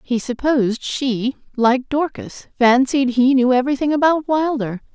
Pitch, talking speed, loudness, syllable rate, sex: 260 Hz, 135 wpm, -18 LUFS, 4.5 syllables/s, female